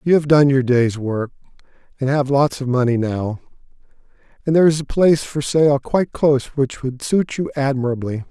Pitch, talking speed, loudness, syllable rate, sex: 135 Hz, 190 wpm, -18 LUFS, 5.4 syllables/s, male